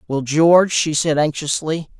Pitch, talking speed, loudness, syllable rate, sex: 155 Hz, 150 wpm, -17 LUFS, 4.5 syllables/s, male